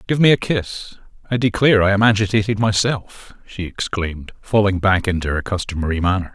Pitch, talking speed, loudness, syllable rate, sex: 100 Hz, 170 wpm, -18 LUFS, 5.6 syllables/s, male